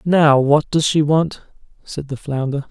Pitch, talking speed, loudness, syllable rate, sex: 150 Hz, 175 wpm, -17 LUFS, 3.9 syllables/s, male